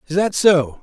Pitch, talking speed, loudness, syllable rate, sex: 175 Hz, 220 wpm, -16 LUFS, 4.6 syllables/s, male